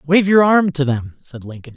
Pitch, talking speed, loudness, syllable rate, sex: 150 Hz, 240 wpm, -15 LUFS, 4.8 syllables/s, male